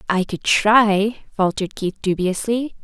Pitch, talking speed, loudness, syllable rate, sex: 205 Hz, 125 wpm, -19 LUFS, 4.1 syllables/s, female